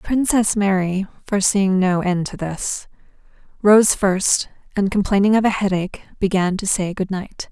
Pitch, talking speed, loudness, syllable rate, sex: 195 Hz, 150 wpm, -19 LUFS, 4.7 syllables/s, female